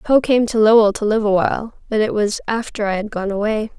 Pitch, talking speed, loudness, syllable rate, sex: 215 Hz, 240 wpm, -17 LUFS, 5.8 syllables/s, female